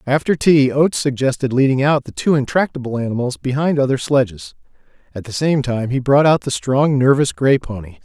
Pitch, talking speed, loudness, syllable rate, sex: 135 Hz, 185 wpm, -17 LUFS, 5.5 syllables/s, male